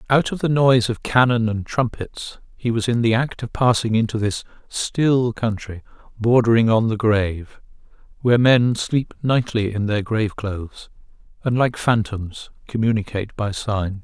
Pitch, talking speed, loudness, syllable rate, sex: 115 Hz, 160 wpm, -20 LUFS, 4.7 syllables/s, male